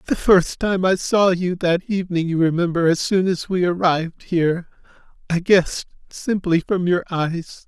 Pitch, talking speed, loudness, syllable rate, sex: 175 Hz, 170 wpm, -19 LUFS, 4.8 syllables/s, male